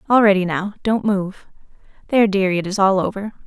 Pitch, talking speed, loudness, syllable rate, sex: 200 Hz, 155 wpm, -18 LUFS, 6.2 syllables/s, female